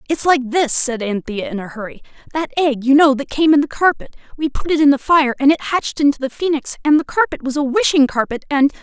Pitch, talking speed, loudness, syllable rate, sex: 285 Hz, 245 wpm, -16 LUFS, 5.9 syllables/s, female